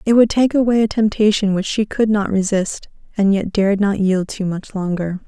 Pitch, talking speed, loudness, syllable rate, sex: 205 Hz, 215 wpm, -17 LUFS, 5.2 syllables/s, female